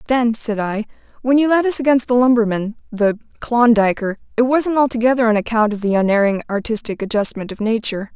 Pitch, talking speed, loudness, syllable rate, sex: 230 Hz, 160 wpm, -17 LUFS, 5.9 syllables/s, female